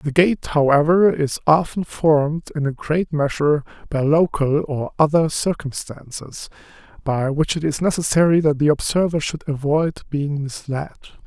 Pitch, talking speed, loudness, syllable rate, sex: 150 Hz, 145 wpm, -19 LUFS, 4.6 syllables/s, male